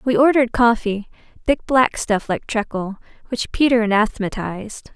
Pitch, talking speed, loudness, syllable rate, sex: 225 Hz, 135 wpm, -19 LUFS, 5.2 syllables/s, female